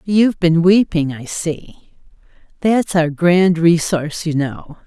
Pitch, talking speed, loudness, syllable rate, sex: 170 Hz, 125 wpm, -16 LUFS, 3.8 syllables/s, female